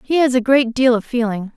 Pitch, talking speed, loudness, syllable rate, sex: 245 Hz, 270 wpm, -16 LUFS, 5.5 syllables/s, female